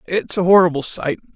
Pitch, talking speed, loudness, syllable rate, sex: 175 Hz, 175 wpm, -17 LUFS, 5.7 syllables/s, female